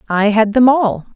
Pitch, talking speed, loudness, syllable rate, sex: 220 Hz, 210 wpm, -13 LUFS, 4.4 syllables/s, female